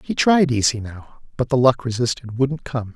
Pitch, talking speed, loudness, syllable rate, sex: 125 Hz, 205 wpm, -20 LUFS, 4.8 syllables/s, male